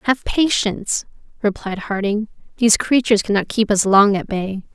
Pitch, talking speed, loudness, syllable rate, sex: 215 Hz, 150 wpm, -18 LUFS, 5.2 syllables/s, female